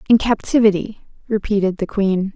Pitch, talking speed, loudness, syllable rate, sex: 205 Hz, 125 wpm, -18 LUFS, 5.1 syllables/s, female